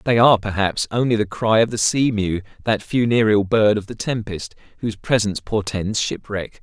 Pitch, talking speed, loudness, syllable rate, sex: 105 Hz, 180 wpm, -20 LUFS, 5.2 syllables/s, male